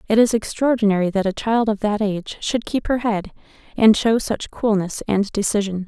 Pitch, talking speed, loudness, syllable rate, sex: 210 Hz, 195 wpm, -20 LUFS, 5.2 syllables/s, female